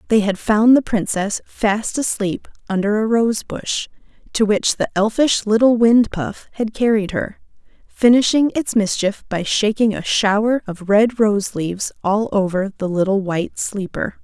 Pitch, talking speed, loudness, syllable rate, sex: 210 Hz, 160 wpm, -18 LUFS, 4.4 syllables/s, female